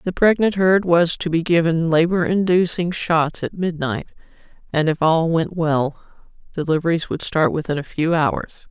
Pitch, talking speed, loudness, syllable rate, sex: 165 Hz, 165 wpm, -19 LUFS, 4.7 syllables/s, female